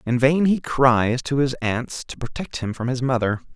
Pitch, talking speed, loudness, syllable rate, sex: 130 Hz, 220 wpm, -21 LUFS, 4.5 syllables/s, male